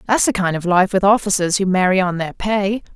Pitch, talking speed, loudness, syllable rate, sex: 190 Hz, 245 wpm, -17 LUFS, 5.6 syllables/s, female